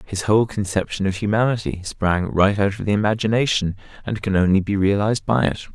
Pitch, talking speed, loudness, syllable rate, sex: 100 Hz, 190 wpm, -20 LUFS, 5.9 syllables/s, male